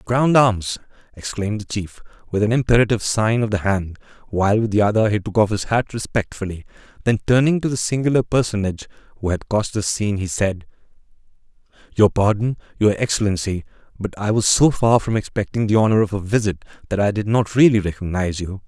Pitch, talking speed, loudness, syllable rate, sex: 105 Hz, 185 wpm, -19 LUFS, 6.1 syllables/s, male